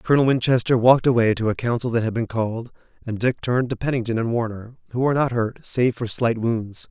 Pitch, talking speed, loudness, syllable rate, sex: 120 Hz, 225 wpm, -21 LUFS, 6.2 syllables/s, male